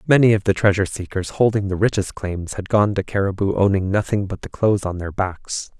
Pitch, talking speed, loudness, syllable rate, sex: 100 Hz, 215 wpm, -20 LUFS, 5.7 syllables/s, male